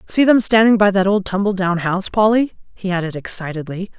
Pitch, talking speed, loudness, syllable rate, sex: 195 Hz, 195 wpm, -16 LUFS, 5.9 syllables/s, female